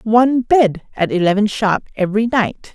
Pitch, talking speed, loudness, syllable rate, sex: 215 Hz, 155 wpm, -16 LUFS, 5.0 syllables/s, female